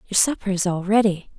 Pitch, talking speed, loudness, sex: 195 Hz, 215 wpm, -20 LUFS, female